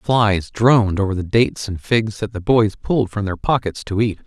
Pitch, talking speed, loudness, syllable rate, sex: 105 Hz, 225 wpm, -18 LUFS, 5.0 syllables/s, male